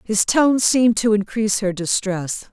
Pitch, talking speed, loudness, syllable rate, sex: 210 Hz, 165 wpm, -18 LUFS, 4.6 syllables/s, female